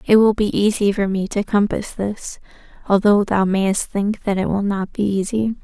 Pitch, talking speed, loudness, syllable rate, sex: 200 Hz, 200 wpm, -19 LUFS, 4.7 syllables/s, female